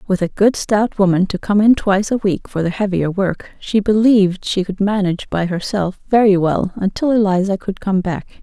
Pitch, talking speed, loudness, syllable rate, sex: 195 Hz, 205 wpm, -16 LUFS, 5.0 syllables/s, female